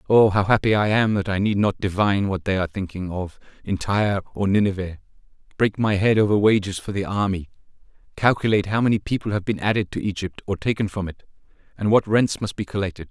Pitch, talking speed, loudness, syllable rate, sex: 100 Hz, 210 wpm, -22 LUFS, 6.3 syllables/s, male